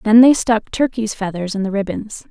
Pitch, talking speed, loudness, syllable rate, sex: 215 Hz, 210 wpm, -17 LUFS, 5.1 syllables/s, female